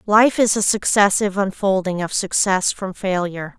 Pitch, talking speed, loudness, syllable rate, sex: 195 Hz, 150 wpm, -18 LUFS, 4.9 syllables/s, female